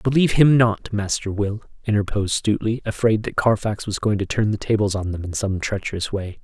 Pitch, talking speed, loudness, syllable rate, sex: 105 Hz, 205 wpm, -21 LUFS, 5.8 syllables/s, male